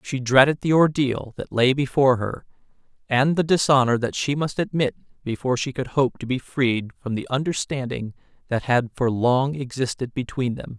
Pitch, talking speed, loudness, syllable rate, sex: 130 Hz, 180 wpm, -22 LUFS, 5.1 syllables/s, male